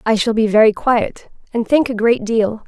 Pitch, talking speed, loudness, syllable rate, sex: 225 Hz, 225 wpm, -16 LUFS, 4.7 syllables/s, female